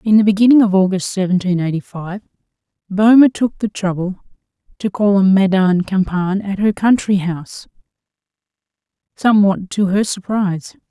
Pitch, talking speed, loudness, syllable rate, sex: 195 Hz, 140 wpm, -15 LUFS, 5.2 syllables/s, female